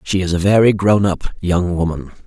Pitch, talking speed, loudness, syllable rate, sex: 95 Hz, 210 wpm, -16 LUFS, 5.1 syllables/s, male